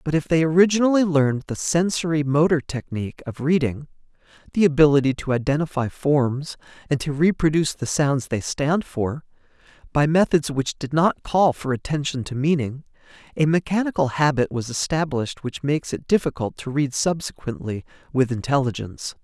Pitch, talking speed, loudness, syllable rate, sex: 145 Hz, 145 wpm, -22 LUFS, 5.4 syllables/s, male